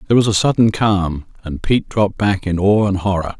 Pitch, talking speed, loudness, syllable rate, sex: 100 Hz, 230 wpm, -16 LUFS, 5.9 syllables/s, male